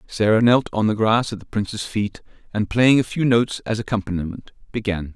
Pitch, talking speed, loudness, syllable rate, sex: 110 Hz, 200 wpm, -21 LUFS, 5.7 syllables/s, male